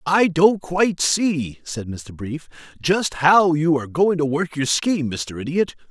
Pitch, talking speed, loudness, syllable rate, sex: 160 Hz, 185 wpm, -20 LUFS, 4.2 syllables/s, male